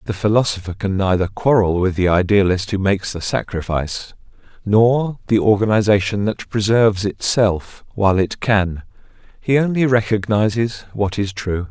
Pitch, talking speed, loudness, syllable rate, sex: 105 Hz, 140 wpm, -18 LUFS, 4.9 syllables/s, male